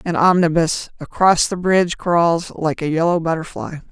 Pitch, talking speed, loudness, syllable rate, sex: 170 Hz, 155 wpm, -17 LUFS, 4.7 syllables/s, female